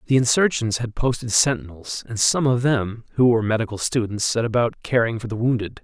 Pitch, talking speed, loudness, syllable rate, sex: 115 Hz, 195 wpm, -21 LUFS, 5.6 syllables/s, male